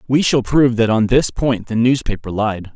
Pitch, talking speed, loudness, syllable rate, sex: 120 Hz, 220 wpm, -16 LUFS, 5.0 syllables/s, male